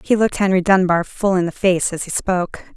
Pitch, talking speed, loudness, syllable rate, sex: 185 Hz, 240 wpm, -18 LUFS, 5.7 syllables/s, female